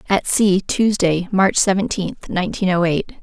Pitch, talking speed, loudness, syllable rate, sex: 190 Hz, 150 wpm, -18 LUFS, 4.5 syllables/s, female